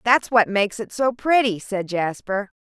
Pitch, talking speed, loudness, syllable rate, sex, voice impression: 215 Hz, 180 wpm, -21 LUFS, 4.6 syllables/s, female, very feminine, very adult-like, middle-aged, thin, very tensed, very powerful, bright, hard, very clear, very fluent, slightly raspy, cool, slightly intellectual, refreshing, sincere, slightly calm, slightly friendly, slightly reassuring, very unique, slightly elegant, wild, slightly sweet, very lively, very strict, very intense, sharp, light